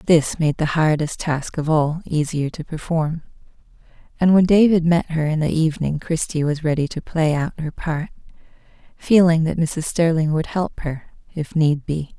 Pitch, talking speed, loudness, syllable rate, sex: 160 Hz, 175 wpm, -20 LUFS, 4.6 syllables/s, female